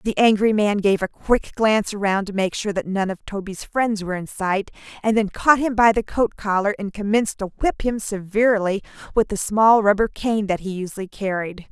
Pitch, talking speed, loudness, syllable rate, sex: 205 Hz, 215 wpm, -21 LUFS, 5.3 syllables/s, female